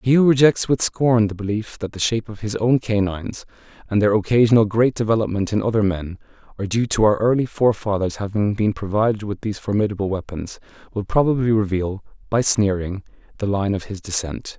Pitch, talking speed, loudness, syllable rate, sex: 105 Hz, 185 wpm, -20 LUFS, 5.9 syllables/s, male